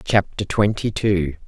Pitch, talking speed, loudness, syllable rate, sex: 100 Hz, 120 wpm, -21 LUFS, 3.9 syllables/s, female